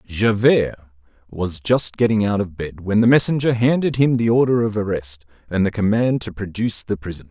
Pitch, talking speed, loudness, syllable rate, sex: 105 Hz, 190 wpm, -19 LUFS, 5.3 syllables/s, male